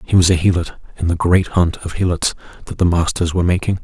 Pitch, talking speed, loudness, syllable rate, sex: 85 Hz, 235 wpm, -17 LUFS, 6.3 syllables/s, male